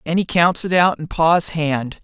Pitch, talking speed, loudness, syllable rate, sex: 165 Hz, 235 wpm, -17 LUFS, 4.2 syllables/s, male